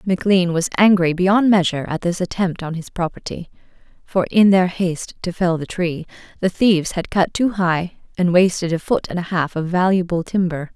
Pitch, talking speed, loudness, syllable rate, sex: 180 Hz, 195 wpm, -18 LUFS, 5.2 syllables/s, female